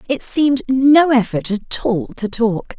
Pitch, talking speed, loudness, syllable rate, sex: 240 Hz, 170 wpm, -16 LUFS, 4.0 syllables/s, female